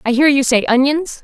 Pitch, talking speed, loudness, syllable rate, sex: 270 Hz, 245 wpm, -14 LUFS, 5.3 syllables/s, female